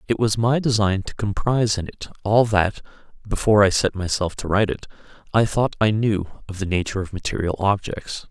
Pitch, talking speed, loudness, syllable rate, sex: 105 Hz, 195 wpm, -21 LUFS, 5.6 syllables/s, male